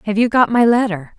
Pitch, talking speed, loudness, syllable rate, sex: 220 Hz, 250 wpm, -15 LUFS, 5.7 syllables/s, female